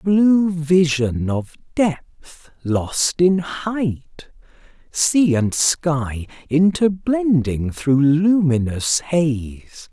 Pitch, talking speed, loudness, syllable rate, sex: 155 Hz, 80 wpm, -18 LUFS, 2.4 syllables/s, male